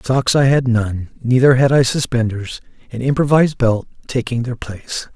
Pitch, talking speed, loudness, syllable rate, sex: 125 Hz, 165 wpm, -16 LUFS, 5.0 syllables/s, male